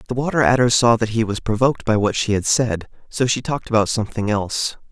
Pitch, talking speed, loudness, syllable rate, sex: 115 Hz, 230 wpm, -19 LUFS, 6.3 syllables/s, male